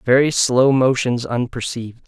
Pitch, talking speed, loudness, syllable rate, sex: 125 Hz, 115 wpm, -17 LUFS, 4.6 syllables/s, male